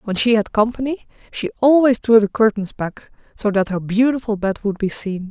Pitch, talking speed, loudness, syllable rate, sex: 220 Hz, 205 wpm, -18 LUFS, 5.2 syllables/s, female